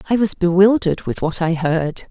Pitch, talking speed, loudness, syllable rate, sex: 180 Hz, 200 wpm, -17 LUFS, 5.2 syllables/s, female